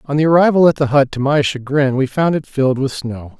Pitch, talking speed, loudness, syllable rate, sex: 140 Hz, 265 wpm, -15 LUFS, 5.8 syllables/s, male